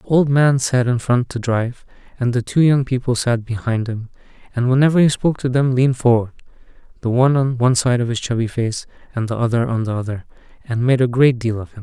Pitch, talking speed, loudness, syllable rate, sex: 125 Hz, 235 wpm, -18 LUFS, 6.1 syllables/s, male